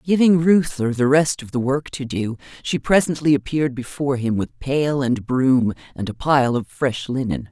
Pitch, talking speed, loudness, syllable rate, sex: 135 Hz, 190 wpm, -20 LUFS, 4.7 syllables/s, female